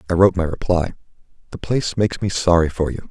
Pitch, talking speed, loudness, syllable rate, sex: 90 Hz, 210 wpm, -19 LUFS, 7.0 syllables/s, male